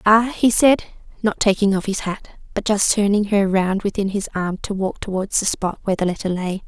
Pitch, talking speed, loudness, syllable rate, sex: 200 Hz, 225 wpm, -20 LUFS, 5.3 syllables/s, female